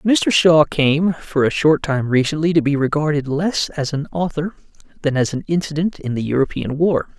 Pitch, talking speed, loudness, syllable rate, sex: 150 Hz, 190 wpm, -18 LUFS, 4.9 syllables/s, male